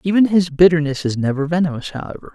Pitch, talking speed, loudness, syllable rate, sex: 160 Hz, 180 wpm, -17 LUFS, 6.7 syllables/s, male